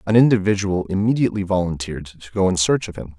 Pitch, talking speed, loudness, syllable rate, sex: 95 Hz, 190 wpm, -20 LUFS, 6.9 syllables/s, male